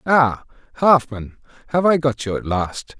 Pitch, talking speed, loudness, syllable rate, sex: 130 Hz, 160 wpm, -19 LUFS, 4.2 syllables/s, male